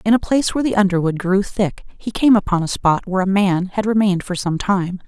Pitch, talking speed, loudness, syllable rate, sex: 195 Hz, 250 wpm, -18 LUFS, 6.0 syllables/s, female